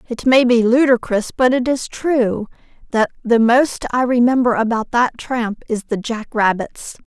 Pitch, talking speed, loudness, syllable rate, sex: 240 Hz, 170 wpm, -17 LUFS, 4.3 syllables/s, female